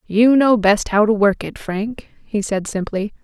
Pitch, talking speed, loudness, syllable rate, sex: 210 Hz, 205 wpm, -17 LUFS, 4.1 syllables/s, female